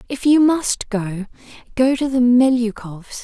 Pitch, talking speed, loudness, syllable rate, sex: 245 Hz, 150 wpm, -17 LUFS, 4.2 syllables/s, female